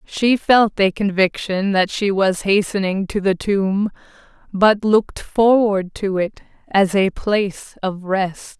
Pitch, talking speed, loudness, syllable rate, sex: 200 Hz, 145 wpm, -18 LUFS, 3.8 syllables/s, female